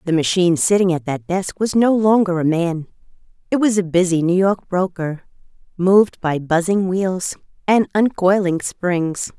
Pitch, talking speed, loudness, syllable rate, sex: 180 Hz, 160 wpm, -18 LUFS, 4.5 syllables/s, female